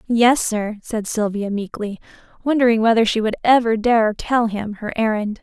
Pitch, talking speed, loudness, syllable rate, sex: 220 Hz, 165 wpm, -19 LUFS, 4.7 syllables/s, female